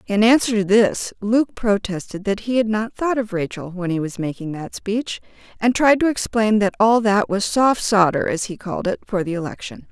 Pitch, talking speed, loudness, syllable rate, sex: 210 Hz, 220 wpm, -20 LUFS, 5.0 syllables/s, female